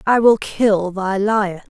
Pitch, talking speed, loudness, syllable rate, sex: 205 Hz, 170 wpm, -17 LUFS, 3.3 syllables/s, female